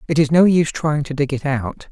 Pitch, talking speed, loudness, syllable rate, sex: 145 Hz, 280 wpm, -18 LUFS, 5.7 syllables/s, male